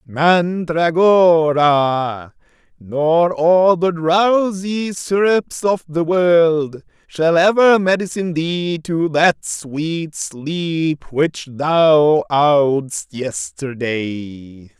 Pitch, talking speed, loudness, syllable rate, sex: 160 Hz, 85 wpm, -16 LUFS, 2.3 syllables/s, male